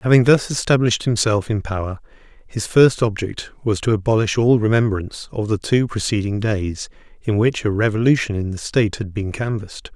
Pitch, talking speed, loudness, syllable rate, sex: 110 Hz, 175 wpm, -19 LUFS, 5.5 syllables/s, male